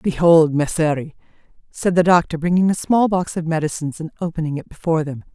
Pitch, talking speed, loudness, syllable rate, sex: 165 Hz, 180 wpm, -19 LUFS, 6.3 syllables/s, female